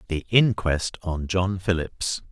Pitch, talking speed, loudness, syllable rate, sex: 90 Hz, 130 wpm, -24 LUFS, 3.5 syllables/s, male